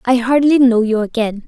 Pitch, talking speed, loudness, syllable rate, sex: 240 Hz, 205 wpm, -14 LUFS, 5.1 syllables/s, female